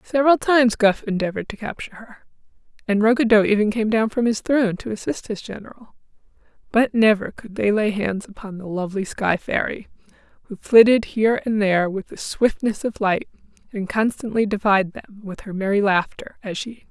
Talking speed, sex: 190 wpm, female